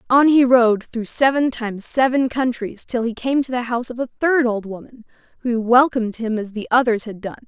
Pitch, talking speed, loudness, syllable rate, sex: 240 Hz, 215 wpm, -19 LUFS, 5.4 syllables/s, female